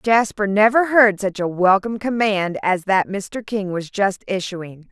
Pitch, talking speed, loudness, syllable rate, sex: 200 Hz, 170 wpm, -19 LUFS, 4.2 syllables/s, female